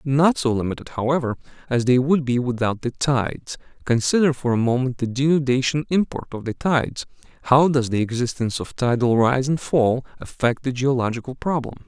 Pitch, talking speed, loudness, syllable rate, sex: 130 Hz, 170 wpm, -21 LUFS, 5.5 syllables/s, male